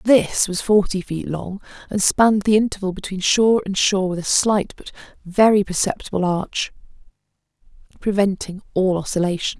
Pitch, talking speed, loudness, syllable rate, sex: 195 Hz, 145 wpm, -19 LUFS, 5.2 syllables/s, female